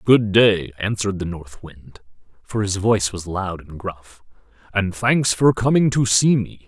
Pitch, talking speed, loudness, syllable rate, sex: 100 Hz, 180 wpm, -19 LUFS, 4.3 syllables/s, male